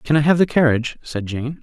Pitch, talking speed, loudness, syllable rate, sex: 140 Hz, 260 wpm, -18 LUFS, 5.8 syllables/s, male